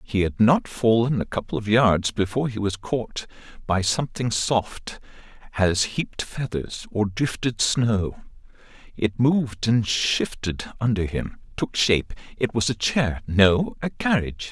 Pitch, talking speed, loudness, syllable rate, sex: 110 Hz, 145 wpm, -23 LUFS, 4.2 syllables/s, male